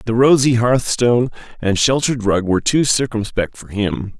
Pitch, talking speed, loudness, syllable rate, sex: 115 Hz, 155 wpm, -17 LUFS, 5.1 syllables/s, male